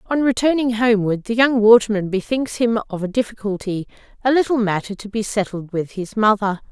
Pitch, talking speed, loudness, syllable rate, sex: 215 Hz, 170 wpm, -19 LUFS, 5.6 syllables/s, female